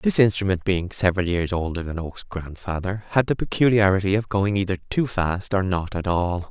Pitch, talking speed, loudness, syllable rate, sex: 95 Hz, 195 wpm, -23 LUFS, 5.3 syllables/s, male